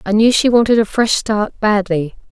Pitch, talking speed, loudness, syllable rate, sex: 215 Hz, 210 wpm, -14 LUFS, 4.9 syllables/s, female